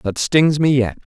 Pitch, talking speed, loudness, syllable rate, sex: 135 Hz, 210 wpm, -16 LUFS, 4.1 syllables/s, male